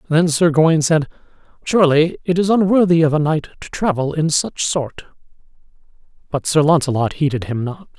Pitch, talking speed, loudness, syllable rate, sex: 155 Hz, 165 wpm, -17 LUFS, 5.4 syllables/s, male